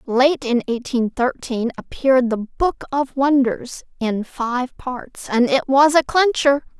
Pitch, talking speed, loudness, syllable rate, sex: 260 Hz, 150 wpm, -19 LUFS, 3.7 syllables/s, female